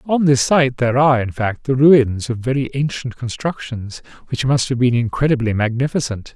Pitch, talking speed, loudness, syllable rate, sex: 125 Hz, 180 wpm, -17 LUFS, 5.2 syllables/s, male